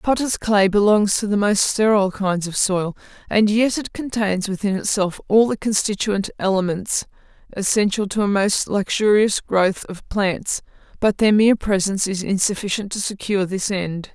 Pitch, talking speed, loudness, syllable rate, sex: 200 Hz, 160 wpm, -19 LUFS, 4.8 syllables/s, female